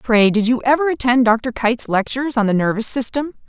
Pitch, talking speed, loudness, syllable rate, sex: 240 Hz, 205 wpm, -17 LUFS, 5.9 syllables/s, female